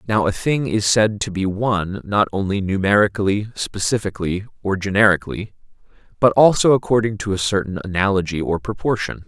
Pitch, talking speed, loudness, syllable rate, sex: 100 Hz, 150 wpm, -19 LUFS, 5.7 syllables/s, male